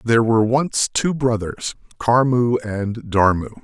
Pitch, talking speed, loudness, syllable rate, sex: 115 Hz, 130 wpm, -19 LUFS, 4.1 syllables/s, male